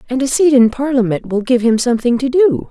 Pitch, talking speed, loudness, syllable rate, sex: 250 Hz, 245 wpm, -14 LUFS, 5.9 syllables/s, female